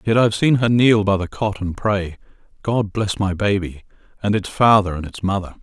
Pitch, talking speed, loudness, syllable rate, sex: 100 Hz, 215 wpm, -19 LUFS, 5.2 syllables/s, male